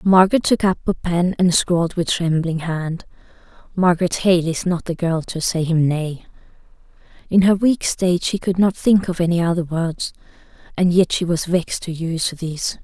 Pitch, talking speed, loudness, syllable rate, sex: 175 Hz, 185 wpm, -19 LUFS, 5.1 syllables/s, female